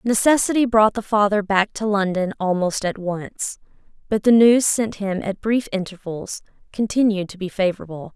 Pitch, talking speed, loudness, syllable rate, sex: 205 Hz, 160 wpm, -20 LUFS, 4.9 syllables/s, female